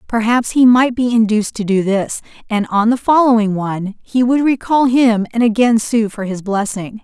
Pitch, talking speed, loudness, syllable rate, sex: 225 Hz, 195 wpm, -15 LUFS, 4.9 syllables/s, female